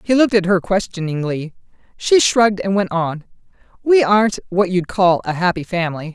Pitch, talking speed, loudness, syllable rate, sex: 190 Hz, 175 wpm, -17 LUFS, 5.5 syllables/s, female